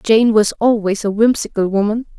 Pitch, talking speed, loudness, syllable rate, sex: 215 Hz, 165 wpm, -15 LUFS, 5.0 syllables/s, female